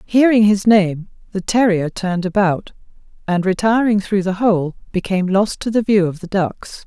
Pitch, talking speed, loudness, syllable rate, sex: 195 Hz, 175 wpm, -17 LUFS, 4.8 syllables/s, female